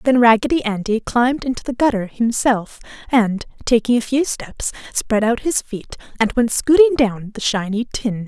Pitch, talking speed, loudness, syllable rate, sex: 235 Hz, 175 wpm, -18 LUFS, 4.8 syllables/s, female